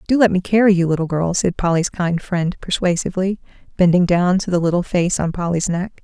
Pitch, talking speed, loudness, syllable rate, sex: 180 Hz, 210 wpm, -18 LUFS, 5.7 syllables/s, female